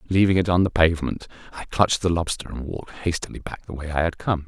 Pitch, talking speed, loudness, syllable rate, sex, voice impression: 85 Hz, 240 wpm, -23 LUFS, 6.5 syllables/s, male, masculine, middle-aged, tensed, powerful, hard, muffled, raspy, cool, intellectual, mature, wild, lively, strict